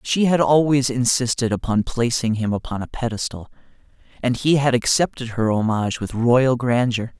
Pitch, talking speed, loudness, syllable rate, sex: 120 Hz, 160 wpm, -20 LUFS, 5.0 syllables/s, male